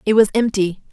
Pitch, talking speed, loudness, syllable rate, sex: 205 Hz, 195 wpm, -17 LUFS, 6.0 syllables/s, female